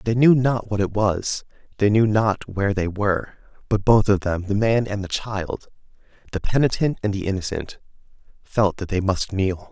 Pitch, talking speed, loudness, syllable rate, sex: 100 Hz, 190 wpm, -22 LUFS, 4.9 syllables/s, male